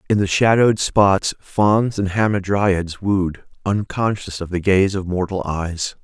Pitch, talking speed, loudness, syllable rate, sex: 95 Hz, 150 wpm, -19 LUFS, 4.0 syllables/s, male